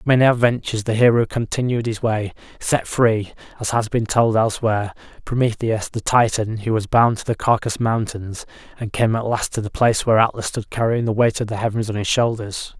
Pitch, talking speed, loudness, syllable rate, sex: 110 Hz, 205 wpm, -20 LUFS, 5.7 syllables/s, male